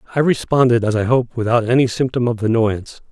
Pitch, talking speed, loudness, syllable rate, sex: 120 Hz, 190 wpm, -17 LUFS, 6.2 syllables/s, male